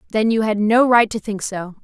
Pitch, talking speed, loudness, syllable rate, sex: 215 Hz, 260 wpm, -17 LUFS, 5.3 syllables/s, female